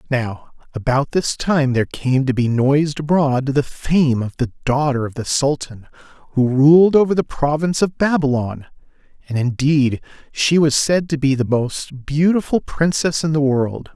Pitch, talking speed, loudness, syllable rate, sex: 140 Hz, 170 wpm, -18 LUFS, 4.5 syllables/s, male